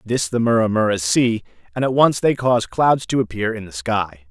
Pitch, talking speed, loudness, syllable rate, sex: 115 Hz, 225 wpm, -19 LUFS, 5.3 syllables/s, male